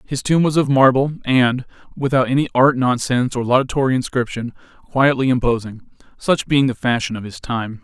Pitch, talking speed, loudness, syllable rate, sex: 130 Hz, 160 wpm, -18 LUFS, 5.5 syllables/s, male